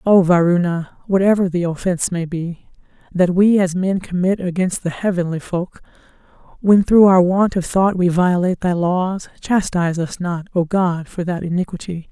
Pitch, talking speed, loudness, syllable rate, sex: 180 Hz, 170 wpm, -17 LUFS, 4.9 syllables/s, female